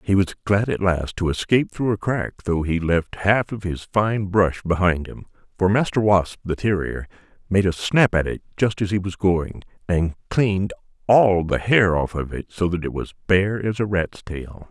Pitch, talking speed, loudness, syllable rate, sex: 95 Hz, 210 wpm, -21 LUFS, 4.5 syllables/s, male